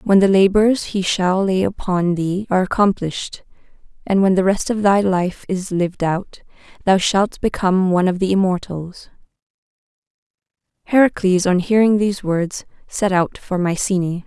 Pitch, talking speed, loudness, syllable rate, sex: 190 Hz, 150 wpm, -18 LUFS, 4.9 syllables/s, female